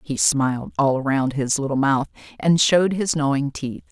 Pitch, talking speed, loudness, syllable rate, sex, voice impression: 135 Hz, 185 wpm, -20 LUFS, 5.0 syllables/s, female, feminine, slightly gender-neutral, very adult-like, middle-aged, thin, slightly tensed, slightly powerful, slightly dark, hard, clear, fluent, slightly raspy, cool, very intellectual, refreshing, sincere, calm, friendly, reassuring, unique, very elegant, slightly wild, slightly sweet, lively, kind, slightly intense, slightly sharp, slightly light